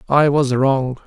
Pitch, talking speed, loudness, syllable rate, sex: 135 Hz, 170 wpm, -16 LUFS, 3.6 syllables/s, male